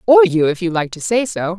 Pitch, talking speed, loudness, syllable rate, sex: 195 Hz, 300 wpm, -16 LUFS, 5.4 syllables/s, female